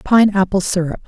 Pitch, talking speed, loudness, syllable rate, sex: 190 Hz, 165 wpm, -16 LUFS, 5.4 syllables/s, female